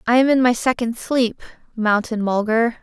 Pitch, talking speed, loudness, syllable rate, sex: 235 Hz, 170 wpm, -19 LUFS, 4.8 syllables/s, female